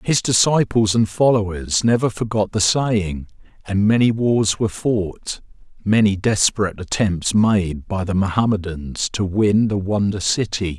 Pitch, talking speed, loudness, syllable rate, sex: 105 Hz, 140 wpm, -19 LUFS, 4.3 syllables/s, male